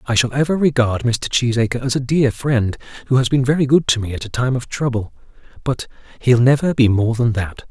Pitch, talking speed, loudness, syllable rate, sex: 125 Hz, 225 wpm, -18 LUFS, 5.6 syllables/s, male